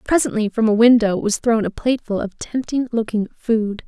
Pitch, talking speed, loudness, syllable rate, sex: 225 Hz, 185 wpm, -19 LUFS, 5.2 syllables/s, female